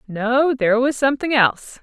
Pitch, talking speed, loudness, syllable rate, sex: 250 Hz, 165 wpm, -18 LUFS, 5.4 syllables/s, female